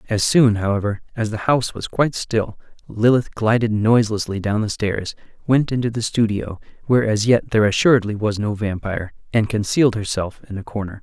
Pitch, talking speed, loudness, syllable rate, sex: 110 Hz, 180 wpm, -19 LUFS, 5.7 syllables/s, male